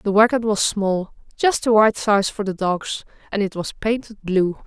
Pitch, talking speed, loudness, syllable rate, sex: 210 Hz, 205 wpm, -20 LUFS, 4.4 syllables/s, female